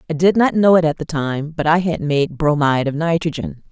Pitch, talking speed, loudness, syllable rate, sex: 160 Hz, 240 wpm, -17 LUFS, 5.5 syllables/s, female